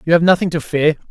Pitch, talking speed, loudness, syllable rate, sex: 160 Hz, 270 wpm, -15 LUFS, 6.8 syllables/s, male